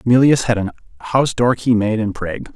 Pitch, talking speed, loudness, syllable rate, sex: 115 Hz, 210 wpm, -17 LUFS, 5.4 syllables/s, male